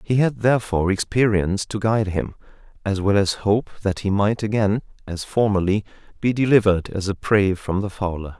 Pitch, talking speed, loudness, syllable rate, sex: 105 Hz, 180 wpm, -21 LUFS, 5.4 syllables/s, male